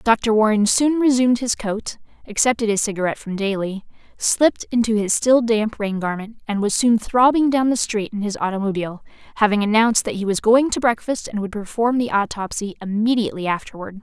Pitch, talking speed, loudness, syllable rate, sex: 220 Hz, 185 wpm, -19 LUFS, 5.7 syllables/s, female